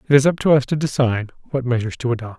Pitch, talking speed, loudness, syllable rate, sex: 130 Hz, 275 wpm, -19 LUFS, 8.0 syllables/s, male